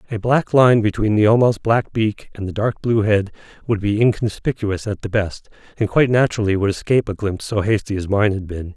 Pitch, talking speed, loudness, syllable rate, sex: 105 Hz, 220 wpm, -18 LUFS, 5.7 syllables/s, male